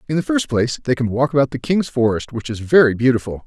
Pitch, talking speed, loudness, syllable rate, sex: 130 Hz, 260 wpm, -18 LUFS, 6.5 syllables/s, male